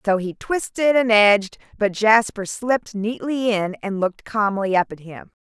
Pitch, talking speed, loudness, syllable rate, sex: 215 Hz, 175 wpm, -20 LUFS, 4.6 syllables/s, female